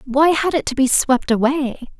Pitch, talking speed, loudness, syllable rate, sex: 275 Hz, 210 wpm, -17 LUFS, 4.6 syllables/s, female